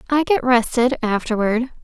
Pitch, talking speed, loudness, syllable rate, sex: 245 Hz, 100 wpm, -18 LUFS, 4.6 syllables/s, female